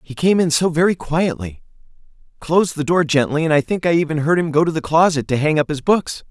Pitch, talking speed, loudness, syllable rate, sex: 155 Hz, 245 wpm, -17 LUFS, 5.9 syllables/s, male